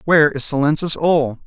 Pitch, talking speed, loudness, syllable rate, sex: 150 Hz, 165 wpm, -16 LUFS, 5.4 syllables/s, male